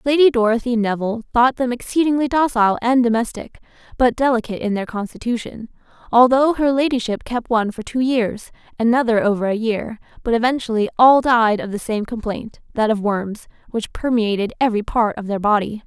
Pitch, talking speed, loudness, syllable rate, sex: 230 Hz, 165 wpm, -18 LUFS, 5.6 syllables/s, female